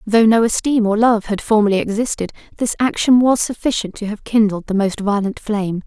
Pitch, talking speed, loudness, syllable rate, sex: 215 Hz, 195 wpm, -17 LUFS, 5.5 syllables/s, female